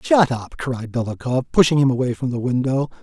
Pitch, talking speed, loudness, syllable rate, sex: 130 Hz, 200 wpm, -20 LUFS, 5.5 syllables/s, male